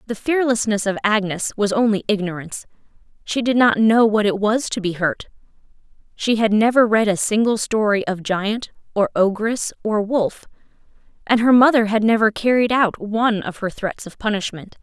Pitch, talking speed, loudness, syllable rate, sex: 215 Hz, 175 wpm, -19 LUFS, 5.0 syllables/s, female